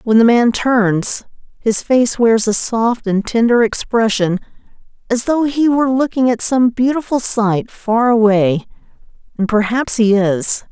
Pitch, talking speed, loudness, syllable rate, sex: 230 Hz, 150 wpm, -15 LUFS, 4.1 syllables/s, female